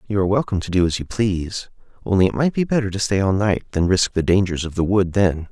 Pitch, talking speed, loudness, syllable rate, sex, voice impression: 100 Hz, 270 wpm, -20 LUFS, 6.4 syllables/s, male, masculine, very adult-like, middle-aged, very thick, very relaxed, weak, dark, soft, muffled, fluent, slightly raspy, very cool, very intellectual, sincere, very calm, very friendly, very reassuring, slightly unique, elegant, slightly wild, very sweet, very kind, slightly modest